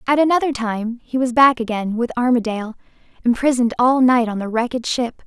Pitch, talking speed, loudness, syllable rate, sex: 240 Hz, 180 wpm, -18 LUFS, 5.8 syllables/s, female